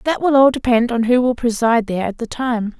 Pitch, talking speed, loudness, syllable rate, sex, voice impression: 240 Hz, 260 wpm, -17 LUFS, 6.0 syllables/s, female, feminine, very adult-like, slightly soft, slightly cute, slightly sincere, calm, slightly sweet, slightly kind